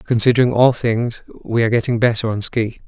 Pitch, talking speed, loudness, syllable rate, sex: 115 Hz, 190 wpm, -17 LUFS, 5.8 syllables/s, male